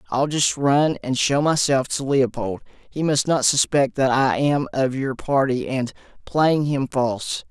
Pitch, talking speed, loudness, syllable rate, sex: 135 Hz, 175 wpm, -21 LUFS, 4.0 syllables/s, male